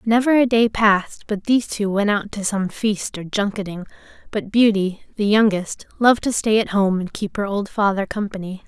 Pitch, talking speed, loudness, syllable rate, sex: 205 Hz, 200 wpm, -20 LUFS, 5.1 syllables/s, female